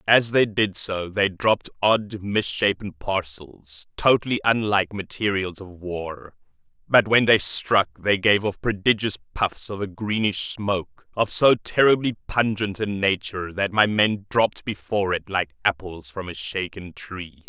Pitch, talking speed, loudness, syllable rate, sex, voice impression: 100 Hz, 155 wpm, -22 LUFS, 4.3 syllables/s, male, very masculine, very adult-like, clear, slightly unique, wild